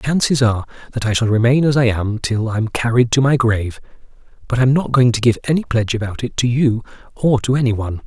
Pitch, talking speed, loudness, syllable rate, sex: 120 Hz, 240 wpm, -17 LUFS, 6.3 syllables/s, male